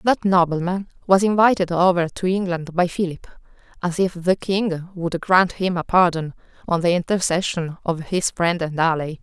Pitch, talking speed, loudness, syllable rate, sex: 175 Hz, 170 wpm, -20 LUFS, 4.7 syllables/s, female